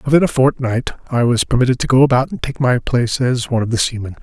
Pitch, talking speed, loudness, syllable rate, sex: 125 Hz, 255 wpm, -16 LUFS, 6.5 syllables/s, male